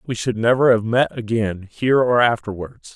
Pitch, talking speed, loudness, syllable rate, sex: 115 Hz, 185 wpm, -18 LUFS, 5.0 syllables/s, male